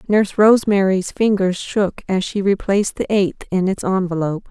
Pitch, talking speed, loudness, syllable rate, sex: 195 Hz, 160 wpm, -18 LUFS, 5.2 syllables/s, female